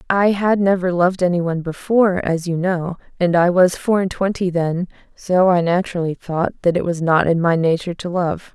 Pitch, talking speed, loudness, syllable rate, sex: 180 Hz, 205 wpm, -18 LUFS, 5.4 syllables/s, female